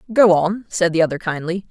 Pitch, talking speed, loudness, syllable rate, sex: 180 Hz, 210 wpm, -18 LUFS, 5.7 syllables/s, female